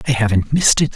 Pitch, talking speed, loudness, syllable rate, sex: 120 Hz, 250 wpm, -15 LUFS, 7.8 syllables/s, male